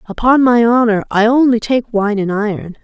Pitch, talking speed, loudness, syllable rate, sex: 225 Hz, 190 wpm, -13 LUFS, 5.0 syllables/s, female